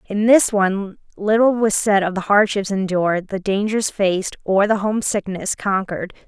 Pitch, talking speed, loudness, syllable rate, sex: 200 Hz, 165 wpm, -18 LUFS, 5.0 syllables/s, female